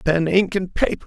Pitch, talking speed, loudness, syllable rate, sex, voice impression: 175 Hz, 225 wpm, -20 LUFS, 4.9 syllables/s, male, very masculine, middle-aged, thick, very tensed, powerful, very bright, slightly soft, very clear, slightly muffled, very fluent, raspy, cool, intellectual, very refreshing, sincere, slightly calm, slightly mature, very friendly, very reassuring, very unique, slightly elegant, very wild, slightly sweet, very lively, slightly strict, intense, slightly sharp, light